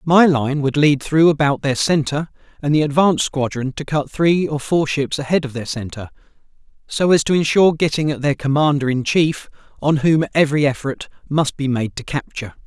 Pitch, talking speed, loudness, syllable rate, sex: 145 Hz, 195 wpm, -18 LUFS, 5.4 syllables/s, male